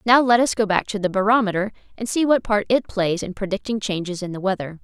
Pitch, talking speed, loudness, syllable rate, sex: 205 Hz, 250 wpm, -21 LUFS, 6.1 syllables/s, female